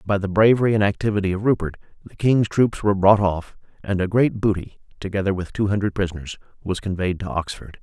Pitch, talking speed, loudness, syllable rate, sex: 100 Hz, 200 wpm, -21 LUFS, 6.1 syllables/s, male